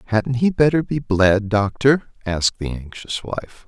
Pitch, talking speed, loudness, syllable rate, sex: 120 Hz, 165 wpm, -19 LUFS, 4.7 syllables/s, male